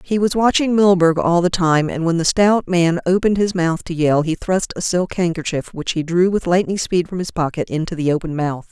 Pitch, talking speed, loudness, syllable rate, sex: 175 Hz, 240 wpm, -18 LUFS, 5.3 syllables/s, female